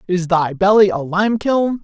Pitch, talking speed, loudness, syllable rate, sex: 195 Hz, 195 wpm, -16 LUFS, 4.2 syllables/s, female